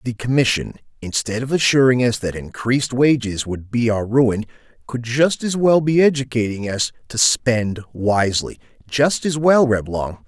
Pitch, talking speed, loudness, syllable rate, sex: 120 Hz, 160 wpm, -18 LUFS, 4.5 syllables/s, male